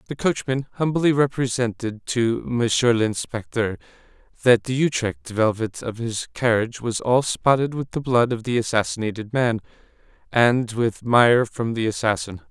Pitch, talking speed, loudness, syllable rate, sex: 120 Hz, 145 wpm, -22 LUFS, 4.6 syllables/s, male